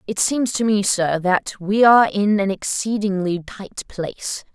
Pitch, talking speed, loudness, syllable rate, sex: 200 Hz, 170 wpm, -19 LUFS, 4.5 syllables/s, female